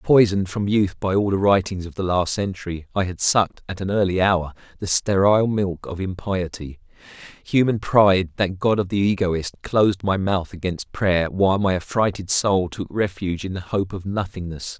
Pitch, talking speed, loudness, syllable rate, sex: 95 Hz, 185 wpm, -21 LUFS, 5.1 syllables/s, male